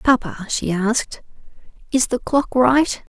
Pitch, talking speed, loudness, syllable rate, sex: 245 Hz, 135 wpm, -19 LUFS, 4.2 syllables/s, female